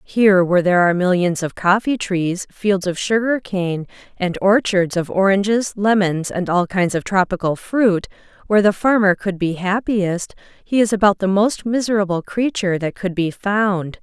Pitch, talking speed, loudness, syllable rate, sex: 195 Hz, 170 wpm, -18 LUFS, 4.8 syllables/s, female